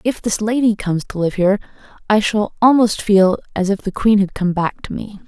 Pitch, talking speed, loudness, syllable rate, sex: 205 Hz, 225 wpm, -17 LUFS, 5.4 syllables/s, female